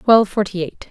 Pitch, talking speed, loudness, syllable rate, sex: 200 Hz, 200 wpm, -18 LUFS, 5.8 syllables/s, female